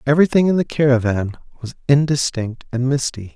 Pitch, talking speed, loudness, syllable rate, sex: 135 Hz, 145 wpm, -18 LUFS, 5.6 syllables/s, male